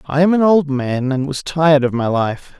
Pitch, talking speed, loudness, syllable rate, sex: 145 Hz, 255 wpm, -16 LUFS, 4.9 syllables/s, male